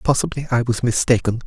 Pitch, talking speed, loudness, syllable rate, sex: 125 Hz, 165 wpm, -19 LUFS, 6.2 syllables/s, male